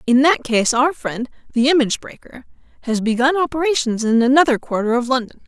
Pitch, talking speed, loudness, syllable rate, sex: 260 Hz, 175 wpm, -17 LUFS, 5.8 syllables/s, female